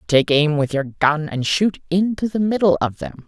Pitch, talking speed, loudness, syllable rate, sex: 160 Hz, 220 wpm, -19 LUFS, 4.6 syllables/s, male